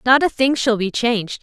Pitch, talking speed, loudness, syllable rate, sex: 240 Hz, 250 wpm, -17 LUFS, 5.3 syllables/s, female